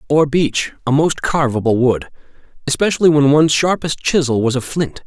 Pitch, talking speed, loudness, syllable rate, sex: 145 Hz, 155 wpm, -16 LUFS, 5.3 syllables/s, male